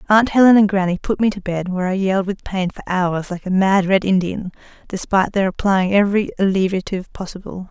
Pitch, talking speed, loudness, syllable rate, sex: 190 Hz, 200 wpm, -18 LUFS, 6.1 syllables/s, female